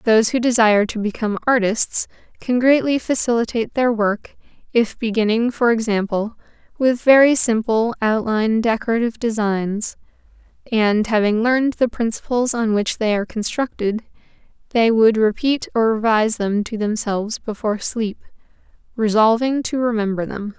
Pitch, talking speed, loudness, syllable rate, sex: 225 Hz, 130 wpm, -18 LUFS, 5.1 syllables/s, female